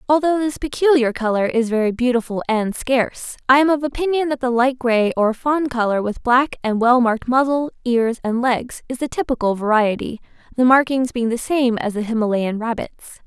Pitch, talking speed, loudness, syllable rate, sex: 245 Hz, 190 wpm, -19 LUFS, 5.2 syllables/s, female